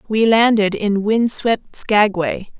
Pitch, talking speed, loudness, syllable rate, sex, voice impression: 210 Hz, 140 wpm, -16 LUFS, 3.4 syllables/s, female, very feminine, slightly young, adult-like, thin, slightly tensed, slightly powerful, bright, hard, clear, slightly fluent, cool, intellectual, slightly refreshing, very sincere, very calm, very friendly, reassuring, unique, elegant, slightly wild, sweet, kind